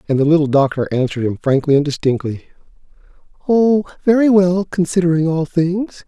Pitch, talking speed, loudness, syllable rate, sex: 165 Hz, 150 wpm, -16 LUFS, 5.5 syllables/s, male